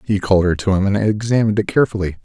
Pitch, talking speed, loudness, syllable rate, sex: 100 Hz, 240 wpm, -17 LUFS, 7.7 syllables/s, male